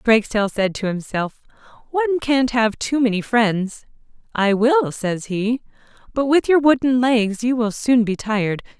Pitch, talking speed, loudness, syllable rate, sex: 235 Hz, 165 wpm, -19 LUFS, 4.4 syllables/s, female